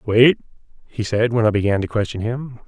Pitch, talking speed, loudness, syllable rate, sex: 115 Hz, 200 wpm, -19 LUFS, 5.4 syllables/s, male